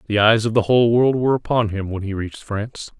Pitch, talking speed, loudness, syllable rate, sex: 110 Hz, 260 wpm, -19 LUFS, 6.5 syllables/s, male